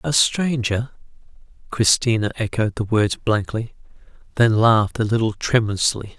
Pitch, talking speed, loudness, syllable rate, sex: 115 Hz, 115 wpm, -19 LUFS, 4.7 syllables/s, male